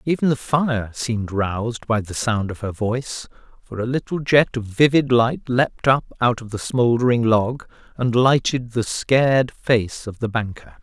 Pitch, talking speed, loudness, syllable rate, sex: 120 Hz, 185 wpm, -20 LUFS, 4.6 syllables/s, male